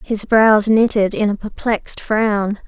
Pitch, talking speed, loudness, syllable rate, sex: 210 Hz, 155 wpm, -16 LUFS, 3.9 syllables/s, female